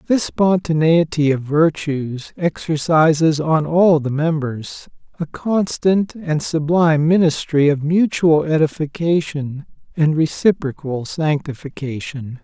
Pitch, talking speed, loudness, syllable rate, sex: 155 Hz, 95 wpm, -17 LUFS, 3.9 syllables/s, male